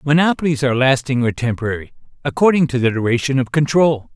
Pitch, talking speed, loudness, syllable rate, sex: 135 Hz, 160 wpm, -17 LUFS, 6.5 syllables/s, male